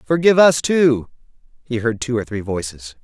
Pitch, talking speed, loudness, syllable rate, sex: 125 Hz, 180 wpm, -17 LUFS, 5.2 syllables/s, male